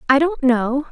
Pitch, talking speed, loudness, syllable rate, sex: 275 Hz, 195 wpm, -17 LUFS, 4.2 syllables/s, female